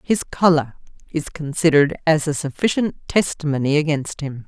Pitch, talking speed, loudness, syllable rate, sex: 155 Hz, 135 wpm, -20 LUFS, 5.1 syllables/s, female